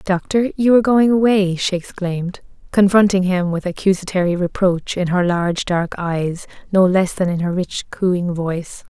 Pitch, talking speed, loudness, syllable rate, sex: 185 Hz, 170 wpm, -18 LUFS, 4.8 syllables/s, female